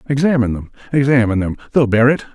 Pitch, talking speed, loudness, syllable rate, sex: 125 Hz, 130 wpm, -16 LUFS, 7.3 syllables/s, male